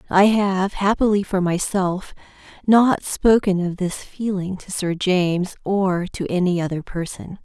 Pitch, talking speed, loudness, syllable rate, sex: 190 Hz, 145 wpm, -20 LUFS, 4.1 syllables/s, female